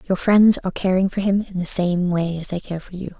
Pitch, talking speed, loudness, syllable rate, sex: 185 Hz, 280 wpm, -19 LUFS, 5.8 syllables/s, female